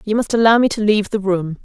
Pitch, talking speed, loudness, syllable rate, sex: 210 Hz, 295 wpm, -16 LUFS, 6.5 syllables/s, female